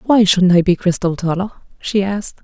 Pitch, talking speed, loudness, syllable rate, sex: 190 Hz, 195 wpm, -15 LUFS, 5.5 syllables/s, female